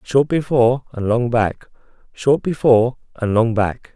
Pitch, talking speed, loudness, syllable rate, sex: 125 Hz, 150 wpm, -18 LUFS, 4.4 syllables/s, male